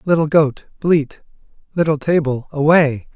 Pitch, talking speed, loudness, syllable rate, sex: 150 Hz, 115 wpm, -17 LUFS, 4.3 syllables/s, male